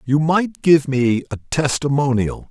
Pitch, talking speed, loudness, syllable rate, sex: 145 Hz, 145 wpm, -18 LUFS, 4.0 syllables/s, male